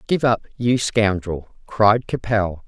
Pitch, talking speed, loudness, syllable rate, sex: 110 Hz, 135 wpm, -20 LUFS, 3.5 syllables/s, female